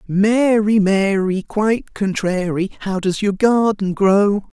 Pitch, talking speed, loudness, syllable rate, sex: 200 Hz, 120 wpm, -17 LUFS, 3.5 syllables/s, male